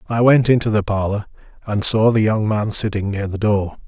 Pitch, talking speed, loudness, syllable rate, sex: 105 Hz, 215 wpm, -18 LUFS, 5.3 syllables/s, male